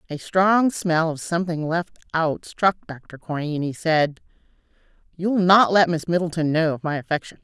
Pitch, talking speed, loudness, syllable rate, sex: 165 Hz, 175 wpm, -21 LUFS, 4.8 syllables/s, female